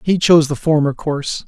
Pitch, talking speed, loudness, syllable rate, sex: 155 Hz, 205 wpm, -15 LUFS, 5.8 syllables/s, male